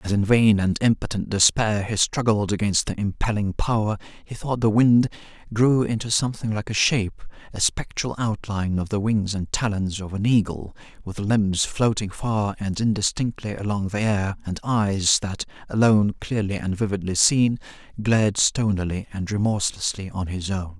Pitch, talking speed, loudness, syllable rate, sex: 105 Hz, 160 wpm, -22 LUFS, 5.0 syllables/s, male